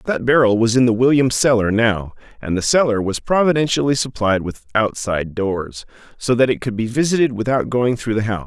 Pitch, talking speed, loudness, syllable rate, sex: 120 Hz, 200 wpm, -17 LUFS, 5.6 syllables/s, male